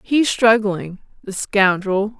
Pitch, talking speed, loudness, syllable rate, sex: 205 Hz, 110 wpm, -17 LUFS, 3.2 syllables/s, female